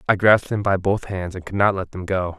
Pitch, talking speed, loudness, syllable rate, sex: 95 Hz, 300 wpm, -21 LUFS, 5.8 syllables/s, male